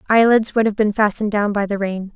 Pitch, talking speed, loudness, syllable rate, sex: 210 Hz, 250 wpm, -17 LUFS, 6.2 syllables/s, female